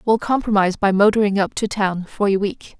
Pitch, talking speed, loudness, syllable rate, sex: 205 Hz, 215 wpm, -18 LUFS, 5.7 syllables/s, female